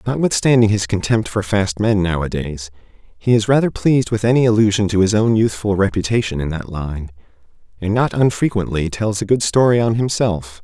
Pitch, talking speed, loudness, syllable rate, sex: 105 Hz, 175 wpm, -17 LUFS, 5.3 syllables/s, male